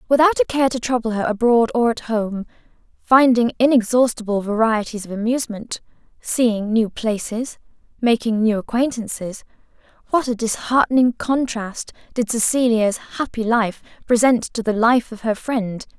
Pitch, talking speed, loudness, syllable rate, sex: 230 Hz, 130 wpm, -19 LUFS, 4.7 syllables/s, female